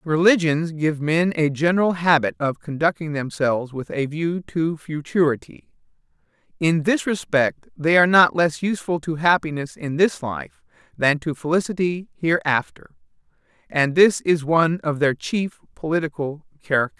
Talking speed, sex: 140 wpm, male